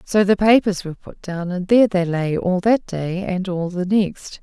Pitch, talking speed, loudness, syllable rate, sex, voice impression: 190 Hz, 230 wpm, -19 LUFS, 4.6 syllables/s, female, feminine, gender-neutral, very adult-like, middle-aged, slightly relaxed, slightly powerful, slightly dark, slightly soft, clear, fluent, slightly raspy, cute, slightly cool, very intellectual, refreshing, very sincere, very calm, very friendly, very reassuring, very unique, elegant, very wild, very sweet, slightly lively, very kind, modest, slightly light